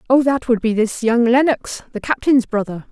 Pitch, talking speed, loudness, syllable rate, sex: 240 Hz, 205 wpm, -17 LUFS, 5.0 syllables/s, female